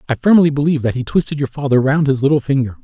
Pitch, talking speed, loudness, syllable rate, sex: 140 Hz, 255 wpm, -15 LUFS, 7.2 syllables/s, male